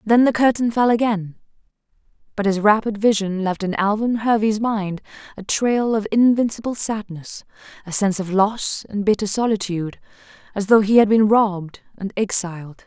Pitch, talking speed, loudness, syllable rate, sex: 210 Hz, 160 wpm, -19 LUFS, 5.1 syllables/s, female